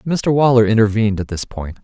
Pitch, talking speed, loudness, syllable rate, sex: 110 Hz, 195 wpm, -16 LUFS, 5.7 syllables/s, male